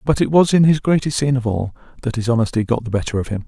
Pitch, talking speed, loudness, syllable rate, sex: 125 Hz, 295 wpm, -18 LUFS, 7.1 syllables/s, male